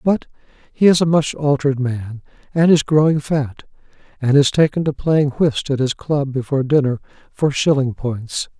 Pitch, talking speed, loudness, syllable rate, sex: 140 Hz, 175 wpm, -17 LUFS, 4.8 syllables/s, male